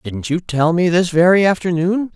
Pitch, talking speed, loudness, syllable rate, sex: 175 Hz, 195 wpm, -16 LUFS, 4.7 syllables/s, male